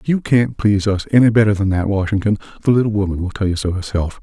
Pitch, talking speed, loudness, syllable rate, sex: 105 Hz, 240 wpm, -17 LUFS, 6.6 syllables/s, male